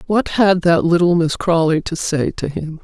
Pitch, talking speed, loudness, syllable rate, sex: 170 Hz, 210 wpm, -16 LUFS, 4.6 syllables/s, female